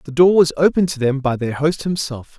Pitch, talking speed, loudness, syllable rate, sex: 150 Hz, 250 wpm, -17 LUFS, 5.9 syllables/s, male